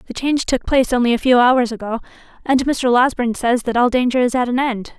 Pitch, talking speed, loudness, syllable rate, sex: 245 Hz, 240 wpm, -17 LUFS, 6.2 syllables/s, female